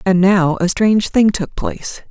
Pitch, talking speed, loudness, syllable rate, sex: 195 Hz, 200 wpm, -15 LUFS, 4.7 syllables/s, female